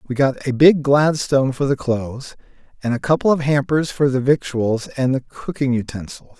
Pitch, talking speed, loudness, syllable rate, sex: 135 Hz, 190 wpm, -18 LUFS, 5.2 syllables/s, male